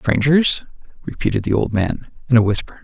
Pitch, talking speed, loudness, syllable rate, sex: 120 Hz, 170 wpm, -18 LUFS, 5.3 syllables/s, male